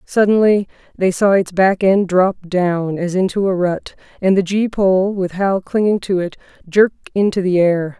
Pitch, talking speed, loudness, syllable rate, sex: 190 Hz, 190 wpm, -16 LUFS, 4.4 syllables/s, female